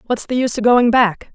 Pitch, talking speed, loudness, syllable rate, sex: 235 Hz, 270 wpm, -15 LUFS, 6.0 syllables/s, female